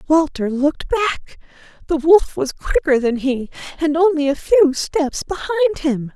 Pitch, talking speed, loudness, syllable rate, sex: 310 Hz, 155 wpm, -18 LUFS, 5.0 syllables/s, female